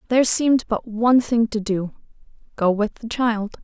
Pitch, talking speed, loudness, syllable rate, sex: 225 Hz, 180 wpm, -20 LUFS, 5.1 syllables/s, female